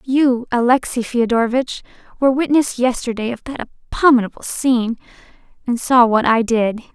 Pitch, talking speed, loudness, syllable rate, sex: 245 Hz, 130 wpm, -17 LUFS, 5.4 syllables/s, female